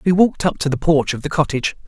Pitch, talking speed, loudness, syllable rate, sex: 155 Hz, 290 wpm, -18 LUFS, 7.1 syllables/s, male